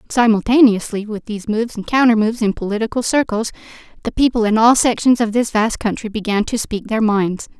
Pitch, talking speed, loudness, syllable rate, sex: 220 Hz, 190 wpm, -17 LUFS, 5.9 syllables/s, female